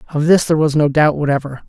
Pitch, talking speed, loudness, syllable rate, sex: 145 Hz, 250 wpm, -15 LUFS, 7.4 syllables/s, male